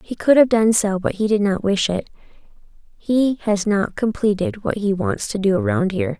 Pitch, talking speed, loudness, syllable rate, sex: 205 Hz, 215 wpm, -19 LUFS, 5.1 syllables/s, female